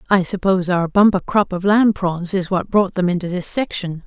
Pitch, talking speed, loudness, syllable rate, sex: 185 Hz, 220 wpm, -18 LUFS, 5.2 syllables/s, female